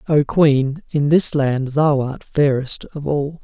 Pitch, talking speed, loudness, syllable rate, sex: 145 Hz, 175 wpm, -18 LUFS, 3.5 syllables/s, male